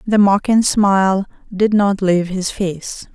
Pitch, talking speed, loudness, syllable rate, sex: 195 Hz, 155 wpm, -16 LUFS, 4.1 syllables/s, female